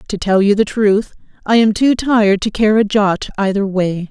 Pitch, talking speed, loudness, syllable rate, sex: 205 Hz, 220 wpm, -14 LUFS, 4.9 syllables/s, female